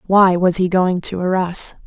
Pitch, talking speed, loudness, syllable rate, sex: 185 Hz, 195 wpm, -16 LUFS, 4.3 syllables/s, female